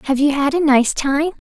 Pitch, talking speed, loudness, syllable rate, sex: 285 Hz, 245 wpm, -16 LUFS, 5.2 syllables/s, female